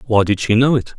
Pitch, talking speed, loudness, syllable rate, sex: 115 Hz, 305 wpm, -15 LUFS, 6.2 syllables/s, male